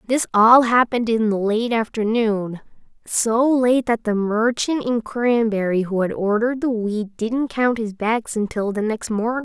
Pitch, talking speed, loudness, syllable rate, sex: 225 Hz, 170 wpm, -20 LUFS, 4.3 syllables/s, female